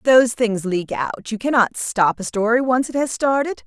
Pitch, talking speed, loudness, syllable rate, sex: 230 Hz, 215 wpm, -19 LUFS, 4.9 syllables/s, female